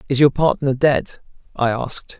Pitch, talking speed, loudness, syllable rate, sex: 135 Hz, 165 wpm, -18 LUFS, 4.8 syllables/s, male